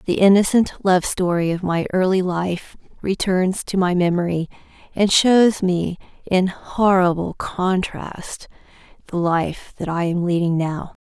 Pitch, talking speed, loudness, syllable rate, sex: 180 Hz, 135 wpm, -19 LUFS, 4.0 syllables/s, female